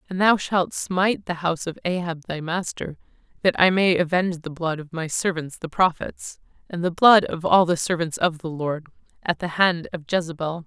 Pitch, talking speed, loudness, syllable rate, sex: 170 Hz, 205 wpm, -22 LUFS, 5.1 syllables/s, female